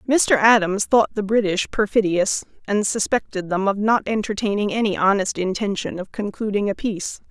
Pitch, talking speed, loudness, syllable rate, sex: 205 Hz, 155 wpm, -20 LUFS, 5.2 syllables/s, female